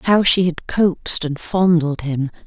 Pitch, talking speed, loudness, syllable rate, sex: 165 Hz, 170 wpm, -18 LUFS, 4.4 syllables/s, female